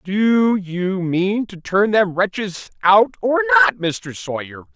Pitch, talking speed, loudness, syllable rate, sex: 195 Hz, 150 wpm, -18 LUFS, 3.3 syllables/s, male